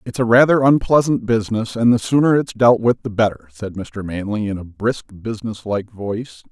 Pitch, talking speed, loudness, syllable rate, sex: 115 Hz, 195 wpm, -18 LUFS, 5.4 syllables/s, male